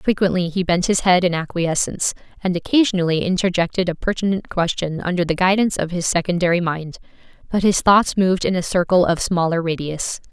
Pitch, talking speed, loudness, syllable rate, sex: 180 Hz, 175 wpm, -19 LUFS, 5.9 syllables/s, female